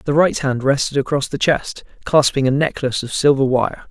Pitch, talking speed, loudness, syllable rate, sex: 140 Hz, 200 wpm, -17 LUFS, 5.2 syllables/s, male